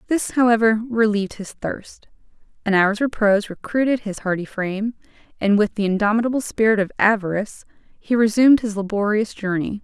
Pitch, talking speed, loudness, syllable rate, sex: 215 Hz, 145 wpm, -20 LUFS, 5.7 syllables/s, female